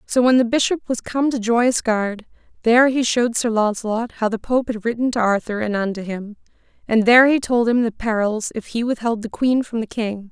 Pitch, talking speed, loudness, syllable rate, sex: 230 Hz, 225 wpm, -19 LUFS, 5.4 syllables/s, female